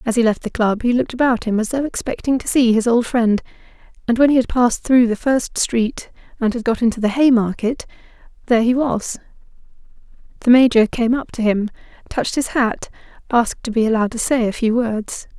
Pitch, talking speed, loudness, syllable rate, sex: 235 Hz, 205 wpm, -18 LUFS, 5.8 syllables/s, female